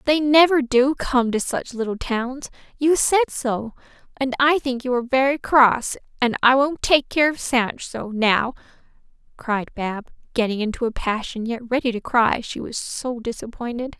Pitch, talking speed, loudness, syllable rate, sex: 250 Hz, 175 wpm, -21 LUFS, 4.5 syllables/s, female